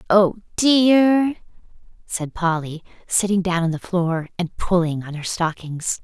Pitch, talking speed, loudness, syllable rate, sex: 185 Hz, 140 wpm, -20 LUFS, 3.9 syllables/s, female